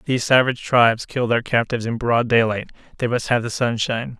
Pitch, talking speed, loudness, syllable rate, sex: 120 Hz, 200 wpm, -19 LUFS, 6.2 syllables/s, male